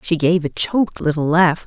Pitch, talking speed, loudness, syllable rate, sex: 165 Hz, 215 wpm, -17 LUFS, 5.1 syllables/s, female